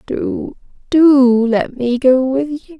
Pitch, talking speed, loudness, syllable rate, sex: 265 Hz, 130 wpm, -14 LUFS, 3.0 syllables/s, female